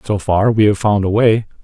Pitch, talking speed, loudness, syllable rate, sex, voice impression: 105 Hz, 255 wpm, -14 LUFS, 5.0 syllables/s, male, very masculine, very adult-like, old, very thick, slightly tensed, very powerful, slightly bright, soft, clear, very fluent, very cool, very intellectual, sincere, very calm, very mature, very friendly, very reassuring, very unique, elegant, wild, very sweet, slightly lively, very kind, modest